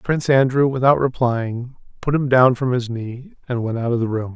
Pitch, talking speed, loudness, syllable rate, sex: 125 Hz, 220 wpm, -19 LUFS, 5.2 syllables/s, male